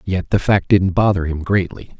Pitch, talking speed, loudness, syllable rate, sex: 90 Hz, 210 wpm, -17 LUFS, 4.8 syllables/s, male